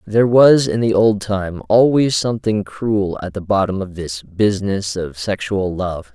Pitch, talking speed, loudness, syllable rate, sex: 100 Hz, 175 wpm, -17 LUFS, 4.3 syllables/s, male